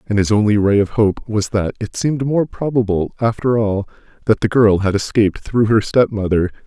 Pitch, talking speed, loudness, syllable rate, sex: 110 Hz, 200 wpm, -17 LUFS, 5.2 syllables/s, male